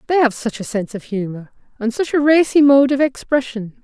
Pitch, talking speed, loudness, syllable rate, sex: 250 Hz, 220 wpm, -17 LUFS, 5.6 syllables/s, female